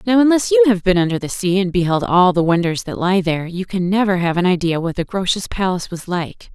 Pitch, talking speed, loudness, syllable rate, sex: 185 Hz, 255 wpm, -17 LUFS, 5.9 syllables/s, female